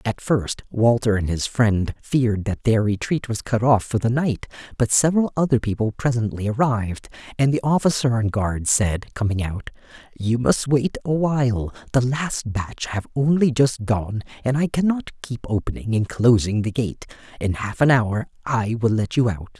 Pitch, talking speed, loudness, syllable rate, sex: 120 Hz, 185 wpm, -21 LUFS, 4.7 syllables/s, male